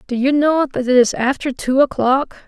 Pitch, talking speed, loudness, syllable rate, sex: 265 Hz, 220 wpm, -16 LUFS, 5.0 syllables/s, female